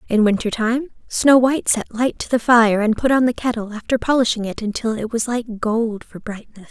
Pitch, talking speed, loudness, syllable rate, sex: 230 Hz, 225 wpm, -18 LUFS, 5.2 syllables/s, female